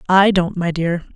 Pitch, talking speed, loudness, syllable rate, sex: 180 Hz, 210 wpm, -17 LUFS, 4.4 syllables/s, female